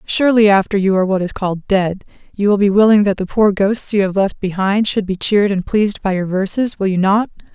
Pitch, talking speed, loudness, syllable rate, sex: 200 Hz, 245 wpm, -15 LUFS, 5.9 syllables/s, female